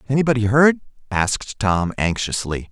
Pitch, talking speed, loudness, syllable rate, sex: 115 Hz, 110 wpm, -19 LUFS, 5.2 syllables/s, male